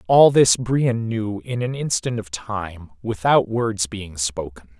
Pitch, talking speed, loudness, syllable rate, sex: 105 Hz, 165 wpm, -20 LUFS, 3.6 syllables/s, male